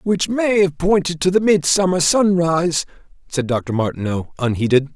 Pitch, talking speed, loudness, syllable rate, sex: 165 Hz, 145 wpm, -18 LUFS, 4.8 syllables/s, male